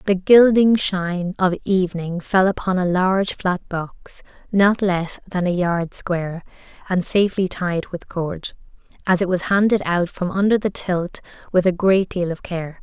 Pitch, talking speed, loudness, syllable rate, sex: 185 Hz, 175 wpm, -20 LUFS, 4.4 syllables/s, female